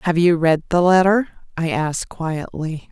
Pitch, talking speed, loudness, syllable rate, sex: 170 Hz, 165 wpm, -18 LUFS, 4.6 syllables/s, female